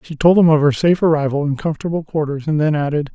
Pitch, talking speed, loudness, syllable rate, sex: 150 Hz, 250 wpm, -16 LUFS, 7.0 syllables/s, male